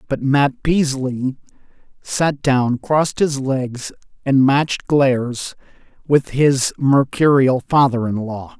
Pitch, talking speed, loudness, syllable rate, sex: 135 Hz, 120 wpm, -17 LUFS, 3.5 syllables/s, male